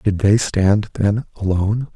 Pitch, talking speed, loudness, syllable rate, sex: 105 Hz, 155 wpm, -18 LUFS, 4.1 syllables/s, male